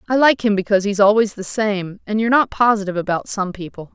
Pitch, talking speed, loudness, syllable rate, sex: 205 Hz, 230 wpm, -18 LUFS, 6.5 syllables/s, female